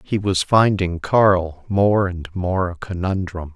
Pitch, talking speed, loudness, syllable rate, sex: 95 Hz, 150 wpm, -19 LUFS, 3.5 syllables/s, male